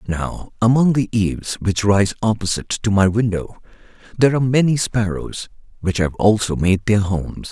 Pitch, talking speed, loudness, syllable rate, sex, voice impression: 105 Hz, 160 wpm, -18 LUFS, 5.1 syllables/s, male, masculine, very adult-like, clear, cool, calm, slightly mature, elegant, sweet, slightly kind